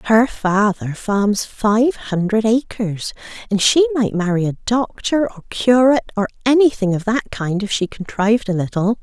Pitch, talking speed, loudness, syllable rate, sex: 220 Hz, 160 wpm, -18 LUFS, 4.5 syllables/s, female